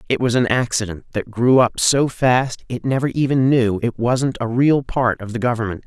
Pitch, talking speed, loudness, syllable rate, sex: 120 Hz, 215 wpm, -18 LUFS, 4.9 syllables/s, male